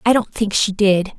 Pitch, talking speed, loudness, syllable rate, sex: 205 Hz, 255 wpm, -17 LUFS, 4.6 syllables/s, female